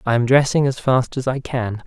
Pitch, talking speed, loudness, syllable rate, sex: 130 Hz, 255 wpm, -19 LUFS, 5.2 syllables/s, male